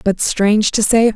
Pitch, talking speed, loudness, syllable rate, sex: 215 Hz, 205 wpm, -14 LUFS, 4.8 syllables/s, female